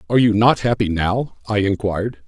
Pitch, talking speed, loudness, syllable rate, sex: 105 Hz, 185 wpm, -18 LUFS, 5.6 syllables/s, male